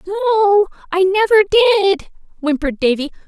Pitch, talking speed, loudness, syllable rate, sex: 380 Hz, 110 wpm, -15 LUFS, 7.8 syllables/s, female